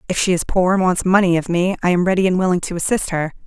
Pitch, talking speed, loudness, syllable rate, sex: 180 Hz, 295 wpm, -17 LUFS, 6.7 syllables/s, female